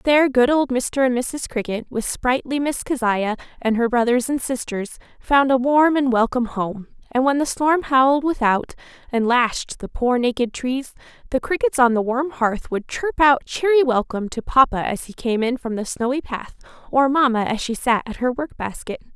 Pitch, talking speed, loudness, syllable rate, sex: 255 Hz, 200 wpm, -20 LUFS, 4.9 syllables/s, female